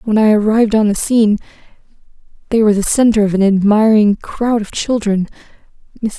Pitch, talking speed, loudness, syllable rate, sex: 215 Hz, 155 wpm, -14 LUFS, 6.0 syllables/s, female